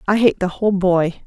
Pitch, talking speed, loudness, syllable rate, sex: 190 Hz, 235 wpm, -17 LUFS, 5.5 syllables/s, female